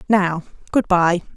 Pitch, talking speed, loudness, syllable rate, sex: 185 Hz, 130 wpm, -18 LUFS, 3.8 syllables/s, female